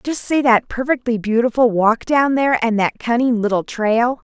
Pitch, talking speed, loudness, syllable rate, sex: 240 Hz, 180 wpm, -17 LUFS, 4.8 syllables/s, female